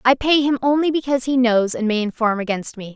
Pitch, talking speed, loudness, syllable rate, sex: 245 Hz, 245 wpm, -19 LUFS, 6.1 syllables/s, female